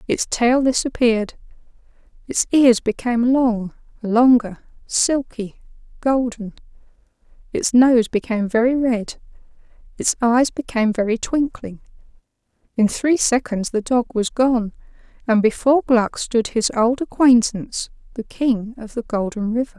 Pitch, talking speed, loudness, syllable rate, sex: 235 Hz, 120 wpm, -19 LUFS, 4.4 syllables/s, female